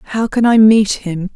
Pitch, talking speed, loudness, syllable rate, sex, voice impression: 210 Hz, 220 wpm, -12 LUFS, 3.9 syllables/s, female, very feminine, slightly young, adult-like, very thin, slightly relaxed, weak, soft, slightly muffled, fluent, slightly raspy, cute, very intellectual, slightly refreshing, very sincere, very calm, friendly, very reassuring, very unique, very elegant, slightly wild, sweet, very kind, slightly modest